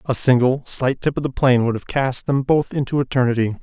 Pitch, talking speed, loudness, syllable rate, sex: 130 Hz, 230 wpm, -19 LUFS, 5.8 syllables/s, male